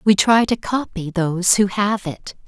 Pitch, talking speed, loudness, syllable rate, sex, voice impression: 195 Hz, 195 wpm, -18 LUFS, 4.4 syllables/s, female, very feminine, middle-aged, slightly calm, very elegant, slightly sweet, kind